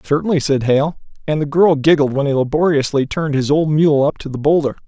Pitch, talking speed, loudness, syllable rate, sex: 145 Hz, 220 wpm, -16 LUFS, 5.9 syllables/s, male